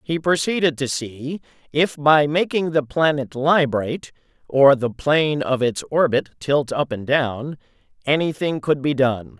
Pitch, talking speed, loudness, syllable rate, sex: 145 Hz, 155 wpm, -20 LUFS, 4.2 syllables/s, male